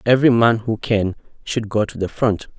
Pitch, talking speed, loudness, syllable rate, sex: 110 Hz, 210 wpm, -19 LUFS, 5.1 syllables/s, male